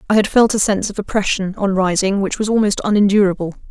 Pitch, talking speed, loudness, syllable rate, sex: 200 Hz, 210 wpm, -16 LUFS, 6.5 syllables/s, female